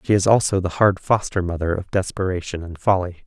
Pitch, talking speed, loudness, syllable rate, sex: 95 Hz, 200 wpm, -21 LUFS, 5.7 syllables/s, male